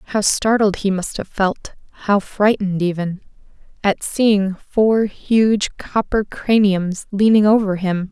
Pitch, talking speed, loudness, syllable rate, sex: 200 Hz, 135 wpm, -18 LUFS, 3.7 syllables/s, female